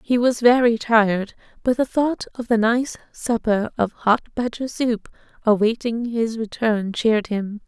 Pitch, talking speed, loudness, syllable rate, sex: 230 Hz, 155 wpm, -21 LUFS, 4.2 syllables/s, female